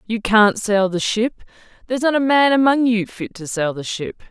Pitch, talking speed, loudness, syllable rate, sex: 220 Hz, 210 wpm, -18 LUFS, 4.9 syllables/s, female